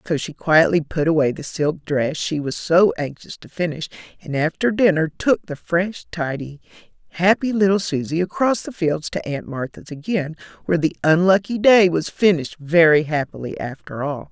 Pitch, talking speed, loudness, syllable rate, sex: 165 Hz, 170 wpm, -20 LUFS, 5.0 syllables/s, female